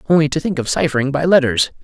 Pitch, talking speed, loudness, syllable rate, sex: 145 Hz, 230 wpm, -16 LUFS, 7.0 syllables/s, male